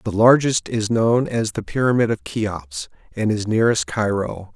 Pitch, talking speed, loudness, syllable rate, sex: 110 Hz, 170 wpm, -20 LUFS, 4.5 syllables/s, male